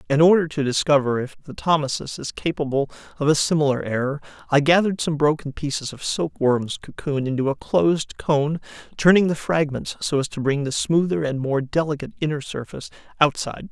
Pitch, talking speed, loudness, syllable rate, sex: 145 Hz, 180 wpm, -22 LUFS, 5.7 syllables/s, male